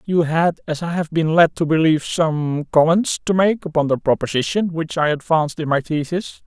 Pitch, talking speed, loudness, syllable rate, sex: 160 Hz, 205 wpm, -19 LUFS, 5.2 syllables/s, male